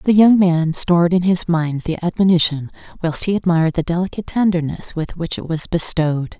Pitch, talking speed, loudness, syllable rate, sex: 170 Hz, 190 wpm, -17 LUFS, 5.5 syllables/s, female